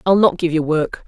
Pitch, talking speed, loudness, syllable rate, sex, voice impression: 170 Hz, 280 wpm, -17 LUFS, 5.3 syllables/s, female, feminine, adult-like, relaxed, weak, fluent, slightly raspy, intellectual, unique, elegant, slightly strict, sharp